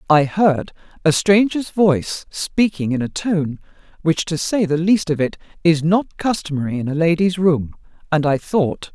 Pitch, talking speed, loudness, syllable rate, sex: 170 Hz, 175 wpm, -18 LUFS, 4.5 syllables/s, female